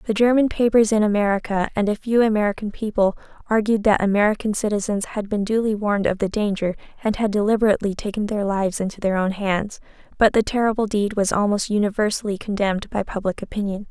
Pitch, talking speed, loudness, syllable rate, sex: 210 Hz, 180 wpm, -21 LUFS, 6.3 syllables/s, female